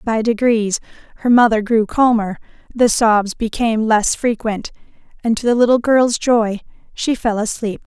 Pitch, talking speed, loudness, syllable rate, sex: 225 Hz, 150 wpm, -16 LUFS, 4.5 syllables/s, female